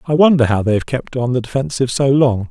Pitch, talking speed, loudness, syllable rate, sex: 130 Hz, 265 wpm, -16 LUFS, 6.2 syllables/s, male